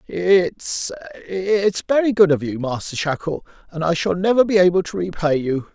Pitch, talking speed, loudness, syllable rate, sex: 180 Hz, 165 wpm, -19 LUFS, 4.6 syllables/s, male